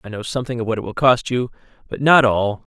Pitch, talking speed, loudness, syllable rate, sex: 120 Hz, 260 wpm, -18 LUFS, 6.4 syllables/s, male